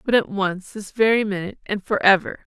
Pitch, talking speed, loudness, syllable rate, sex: 200 Hz, 210 wpm, -20 LUFS, 5.6 syllables/s, female